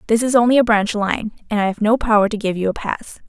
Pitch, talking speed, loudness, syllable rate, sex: 215 Hz, 295 wpm, -17 LUFS, 6.3 syllables/s, female